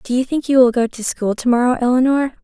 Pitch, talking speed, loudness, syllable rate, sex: 250 Hz, 270 wpm, -16 LUFS, 6.2 syllables/s, female